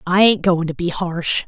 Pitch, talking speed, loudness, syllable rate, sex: 175 Hz, 245 wpm, -18 LUFS, 4.4 syllables/s, female